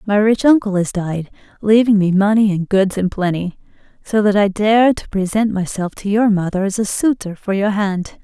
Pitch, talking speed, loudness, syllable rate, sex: 200 Hz, 205 wpm, -16 LUFS, 4.9 syllables/s, female